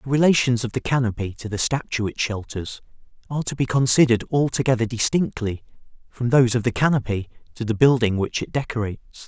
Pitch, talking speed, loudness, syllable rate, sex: 120 Hz, 175 wpm, -22 LUFS, 6.4 syllables/s, male